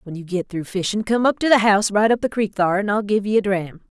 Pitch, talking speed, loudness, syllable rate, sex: 205 Hz, 320 wpm, -19 LUFS, 6.4 syllables/s, female